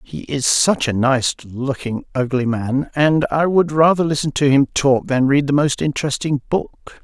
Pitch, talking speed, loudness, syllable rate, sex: 140 Hz, 190 wpm, -17 LUFS, 4.4 syllables/s, male